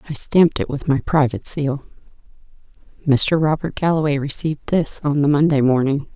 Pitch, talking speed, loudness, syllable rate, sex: 145 Hz, 155 wpm, -18 LUFS, 5.7 syllables/s, female